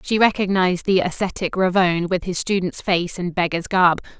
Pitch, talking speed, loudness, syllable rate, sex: 180 Hz, 170 wpm, -20 LUFS, 5.3 syllables/s, female